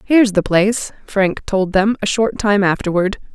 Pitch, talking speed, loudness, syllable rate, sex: 200 Hz, 180 wpm, -16 LUFS, 4.7 syllables/s, female